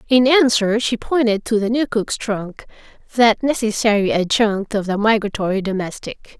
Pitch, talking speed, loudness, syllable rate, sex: 215 Hz, 140 wpm, -18 LUFS, 4.7 syllables/s, female